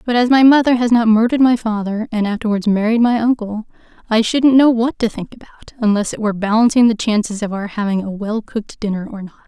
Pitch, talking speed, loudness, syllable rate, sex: 220 Hz, 230 wpm, -16 LUFS, 6.2 syllables/s, female